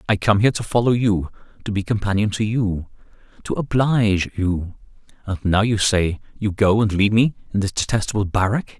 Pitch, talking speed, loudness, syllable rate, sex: 105 Hz, 170 wpm, -20 LUFS, 5.6 syllables/s, male